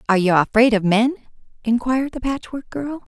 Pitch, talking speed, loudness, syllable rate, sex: 240 Hz, 170 wpm, -19 LUFS, 5.8 syllables/s, female